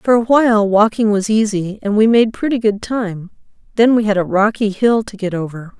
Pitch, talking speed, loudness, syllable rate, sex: 210 Hz, 215 wpm, -15 LUFS, 5.2 syllables/s, female